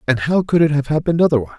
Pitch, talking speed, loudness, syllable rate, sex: 145 Hz, 265 wpm, -16 LUFS, 8.3 syllables/s, male